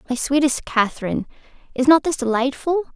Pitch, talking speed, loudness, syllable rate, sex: 270 Hz, 140 wpm, -20 LUFS, 5.9 syllables/s, female